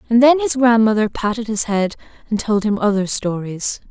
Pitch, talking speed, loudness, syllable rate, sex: 220 Hz, 185 wpm, -17 LUFS, 5.1 syllables/s, female